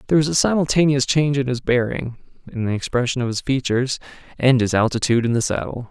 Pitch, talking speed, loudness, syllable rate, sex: 130 Hz, 185 wpm, -20 LUFS, 6.8 syllables/s, male